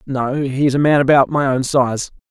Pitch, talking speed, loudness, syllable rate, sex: 135 Hz, 235 wpm, -16 LUFS, 4.9 syllables/s, male